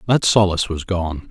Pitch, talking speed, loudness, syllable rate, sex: 95 Hz, 185 wpm, -18 LUFS, 5.2 syllables/s, male